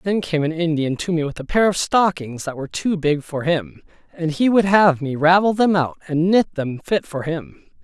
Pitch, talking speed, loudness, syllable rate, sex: 165 Hz, 235 wpm, -19 LUFS, 4.9 syllables/s, male